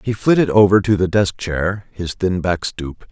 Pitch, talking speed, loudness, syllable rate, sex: 95 Hz, 210 wpm, -17 LUFS, 4.7 syllables/s, male